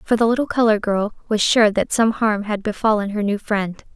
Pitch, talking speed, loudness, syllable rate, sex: 215 Hz, 225 wpm, -19 LUFS, 5.5 syllables/s, female